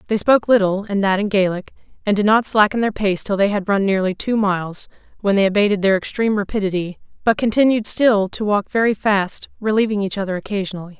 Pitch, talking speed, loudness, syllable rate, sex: 205 Hz, 200 wpm, -18 LUFS, 6.1 syllables/s, female